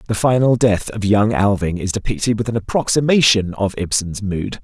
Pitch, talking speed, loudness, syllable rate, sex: 105 Hz, 180 wpm, -17 LUFS, 5.2 syllables/s, male